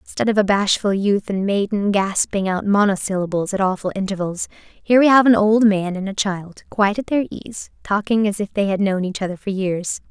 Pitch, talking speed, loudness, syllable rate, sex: 200 Hz, 215 wpm, -19 LUFS, 5.5 syllables/s, female